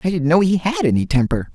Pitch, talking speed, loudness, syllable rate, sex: 160 Hz, 275 wpm, -17 LUFS, 6.2 syllables/s, male